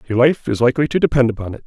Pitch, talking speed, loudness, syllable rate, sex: 130 Hz, 290 wpm, -16 LUFS, 8.0 syllables/s, male